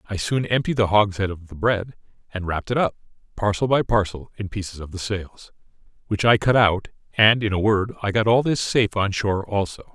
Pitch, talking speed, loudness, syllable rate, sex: 105 Hz, 215 wpm, -22 LUFS, 5.6 syllables/s, male